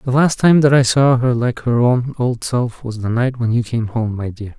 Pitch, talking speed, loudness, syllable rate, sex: 120 Hz, 275 wpm, -16 LUFS, 4.7 syllables/s, male